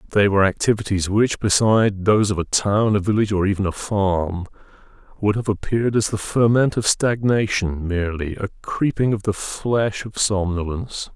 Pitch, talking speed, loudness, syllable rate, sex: 100 Hz, 165 wpm, -20 LUFS, 5.3 syllables/s, male